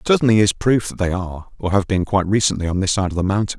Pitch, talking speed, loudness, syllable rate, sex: 100 Hz, 300 wpm, -18 LUFS, 7.1 syllables/s, male